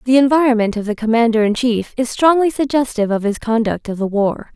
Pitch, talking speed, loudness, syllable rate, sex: 235 Hz, 210 wpm, -16 LUFS, 6.0 syllables/s, female